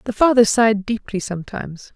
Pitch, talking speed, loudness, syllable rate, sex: 210 Hz, 155 wpm, -18 LUFS, 6.1 syllables/s, female